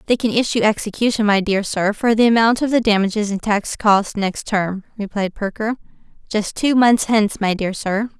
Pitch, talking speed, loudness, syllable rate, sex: 210 Hz, 200 wpm, -18 LUFS, 5.2 syllables/s, female